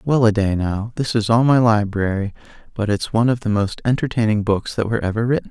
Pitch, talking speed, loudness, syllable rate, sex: 110 Hz, 230 wpm, -19 LUFS, 6.0 syllables/s, male